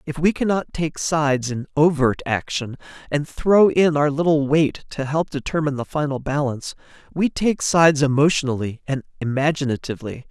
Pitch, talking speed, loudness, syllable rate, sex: 145 Hz, 150 wpm, -20 LUFS, 5.4 syllables/s, male